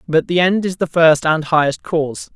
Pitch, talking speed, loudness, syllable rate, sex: 165 Hz, 230 wpm, -16 LUFS, 5.1 syllables/s, male